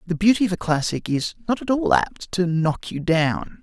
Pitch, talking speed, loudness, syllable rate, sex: 180 Hz, 230 wpm, -22 LUFS, 4.8 syllables/s, male